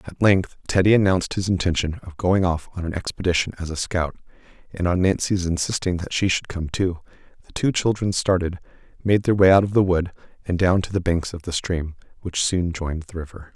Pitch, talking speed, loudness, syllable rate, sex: 90 Hz, 210 wpm, -22 LUFS, 5.7 syllables/s, male